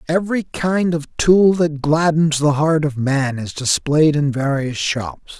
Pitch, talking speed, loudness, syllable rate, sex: 150 Hz, 165 wpm, -17 LUFS, 3.9 syllables/s, male